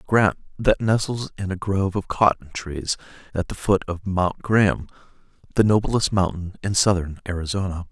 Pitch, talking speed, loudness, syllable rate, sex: 95 Hz, 160 wpm, -22 LUFS, 4.9 syllables/s, male